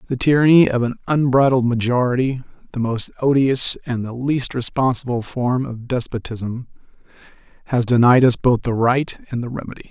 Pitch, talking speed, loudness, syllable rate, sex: 125 Hz, 150 wpm, -18 LUFS, 5.2 syllables/s, male